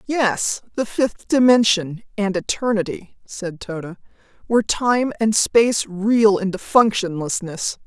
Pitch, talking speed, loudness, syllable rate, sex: 205 Hz, 115 wpm, -19 LUFS, 3.9 syllables/s, female